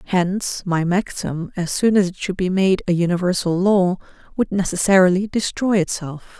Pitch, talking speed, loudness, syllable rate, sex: 185 Hz, 160 wpm, -19 LUFS, 5.0 syllables/s, female